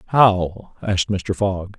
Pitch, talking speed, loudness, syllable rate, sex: 100 Hz, 135 wpm, -20 LUFS, 3.4 syllables/s, male